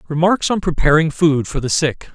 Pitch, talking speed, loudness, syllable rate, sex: 160 Hz, 195 wpm, -17 LUFS, 5.1 syllables/s, male